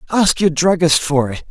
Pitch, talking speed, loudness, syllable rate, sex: 165 Hz, 200 wpm, -15 LUFS, 4.8 syllables/s, male